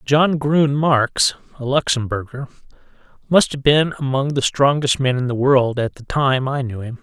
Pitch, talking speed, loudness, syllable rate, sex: 135 Hz, 180 wpm, -18 LUFS, 4.5 syllables/s, male